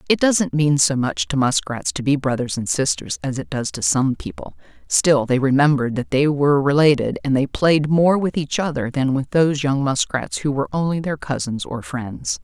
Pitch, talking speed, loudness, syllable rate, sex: 135 Hz, 210 wpm, -19 LUFS, 5.1 syllables/s, female